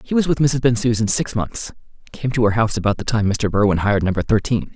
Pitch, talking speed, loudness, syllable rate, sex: 110 Hz, 240 wpm, -19 LUFS, 6.1 syllables/s, male